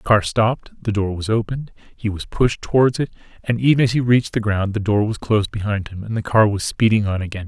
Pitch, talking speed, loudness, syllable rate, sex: 110 Hz, 250 wpm, -19 LUFS, 6.1 syllables/s, male